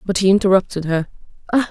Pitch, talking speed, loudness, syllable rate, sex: 195 Hz, 140 wpm, -17 LUFS, 6.9 syllables/s, female